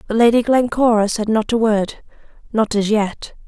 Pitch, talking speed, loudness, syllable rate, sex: 220 Hz, 155 wpm, -17 LUFS, 4.8 syllables/s, female